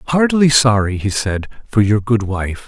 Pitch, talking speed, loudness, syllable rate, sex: 115 Hz, 180 wpm, -15 LUFS, 4.8 syllables/s, male